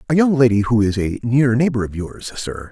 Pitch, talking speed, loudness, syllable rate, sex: 115 Hz, 245 wpm, -18 LUFS, 5.3 syllables/s, male